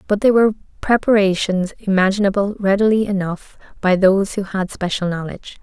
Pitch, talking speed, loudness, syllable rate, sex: 195 Hz, 140 wpm, -17 LUFS, 6.0 syllables/s, female